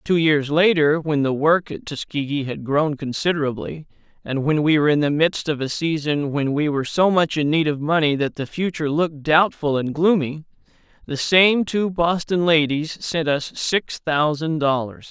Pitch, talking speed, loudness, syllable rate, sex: 155 Hz, 185 wpm, -20 LUFS, 4.8 syllables/s, male